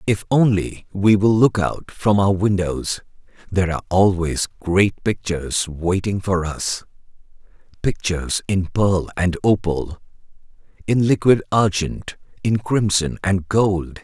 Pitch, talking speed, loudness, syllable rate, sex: 95 Hz, 120 wpm, -19 LUFS, 4.0 syllables/s, male